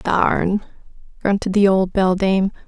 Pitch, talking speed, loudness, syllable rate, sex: 190 Hz, 110 wpm, -18 LUFS, 4.1 syllables/s, female